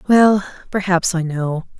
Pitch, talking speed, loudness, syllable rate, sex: 185 Hz, 135 wpm, -18 LUFS, 4.0 syllables/s, female